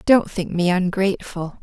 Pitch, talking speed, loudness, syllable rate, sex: 185 Hz, 150 wpm, -21 LUFS, 4.7 syllables/s, female